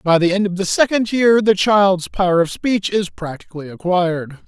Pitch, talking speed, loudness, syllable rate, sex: 190 Hz, 200 wpm, -16 LUFS, 5.0 syllables/s, male